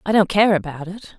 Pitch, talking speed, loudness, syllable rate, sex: 185 Hz, 255 wpm, -17 LUFS, 5.5 syllables/s, female